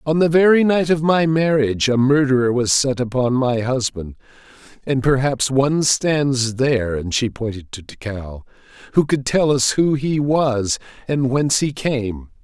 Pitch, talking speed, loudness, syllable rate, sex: 130 Hz, 160 wpm, -18 LUFS, 4.5 syllables/s, male